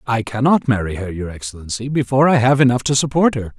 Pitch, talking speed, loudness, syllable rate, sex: 120 Hz, 215 wpm, -17 LUFS, 6.4 syllables/s, male